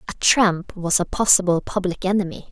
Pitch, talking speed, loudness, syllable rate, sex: 185 Hz, 165 wpm, -19 LUFS, 5.2 syllables/s, female